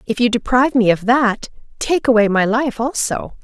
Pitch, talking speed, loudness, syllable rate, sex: 240 Hz, 190 wpm, -16 LUFS, 5.0 syllables/s, female